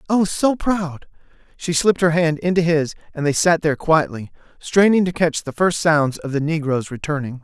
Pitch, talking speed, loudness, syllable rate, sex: 160 Hz, 195 wpm, -19 LUFS, 5.1 syllables/s, male